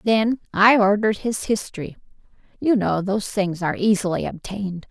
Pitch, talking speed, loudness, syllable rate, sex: 200 Hz, 135 wpm, -21 LUFS, 5.5 syllables/s, female